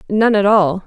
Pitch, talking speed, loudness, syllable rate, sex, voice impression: 200 Hz, 210 wpm, -14 LUFS, 4.6 syllables/s, female, feminine, adult-like, slightly fluent, sincere, slightly calm, slightly sweet